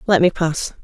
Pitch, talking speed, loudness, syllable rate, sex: 170 Hz, 215 wpm, -18 LUFS, 4.8 syllables/s, female